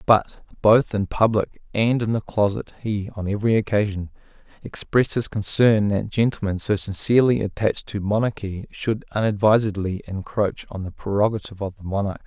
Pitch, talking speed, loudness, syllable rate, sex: 105 Hz, 150 wpm, -22 LUFS, 5.3 syllables/s, male